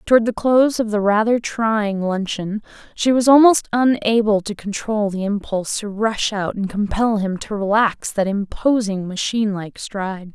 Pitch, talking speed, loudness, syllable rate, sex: 210 Hz, 170 wpm, -19 LUFS, 4.7 syllables/s, female